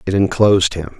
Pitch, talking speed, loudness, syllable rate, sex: 95 Hz, 180 wpm, -15 LUFS, 6.0 syllables/s, male